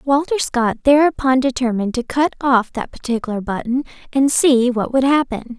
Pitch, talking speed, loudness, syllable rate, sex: 255 Hz, 160 wpm, -17 LUFS, 5.1 syllables/s, female